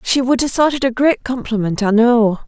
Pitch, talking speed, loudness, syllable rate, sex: 240 Hz, 245 wpm, -15 LUFS, 5.2 syllables/s, female